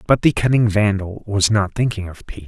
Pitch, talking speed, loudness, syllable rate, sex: 105 Hz, 220 wpm, -18 LUFS, 5.7 syllables/s, male